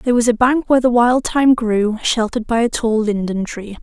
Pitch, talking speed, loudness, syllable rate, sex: 230 Hz, 235 wpm, -16 LUFS, 5.7 syllables/s, female